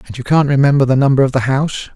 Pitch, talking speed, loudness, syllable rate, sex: 135 Hz, 275 wpm, -14 LUFS, 7.3 syllables/s, male